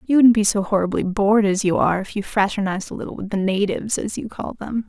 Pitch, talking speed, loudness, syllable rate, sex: 205 Hz, 260 wpm, -20 LUFS, 6.6 syllables/s, female